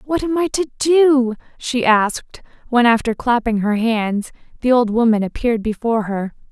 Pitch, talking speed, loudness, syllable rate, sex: 240 Hz, 165 wpm, -17 LUFS, 4.8 syllables/s, female